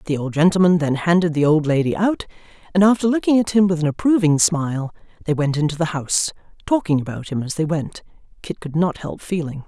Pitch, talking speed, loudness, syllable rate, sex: 165 Hz, 205 wpm, -19 LUFS, 6.0 syllables/s, female